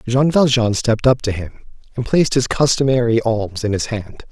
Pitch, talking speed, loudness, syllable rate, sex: 120 Hz, 195 wpm, -17 LUFS, 5.4 syllables/s, male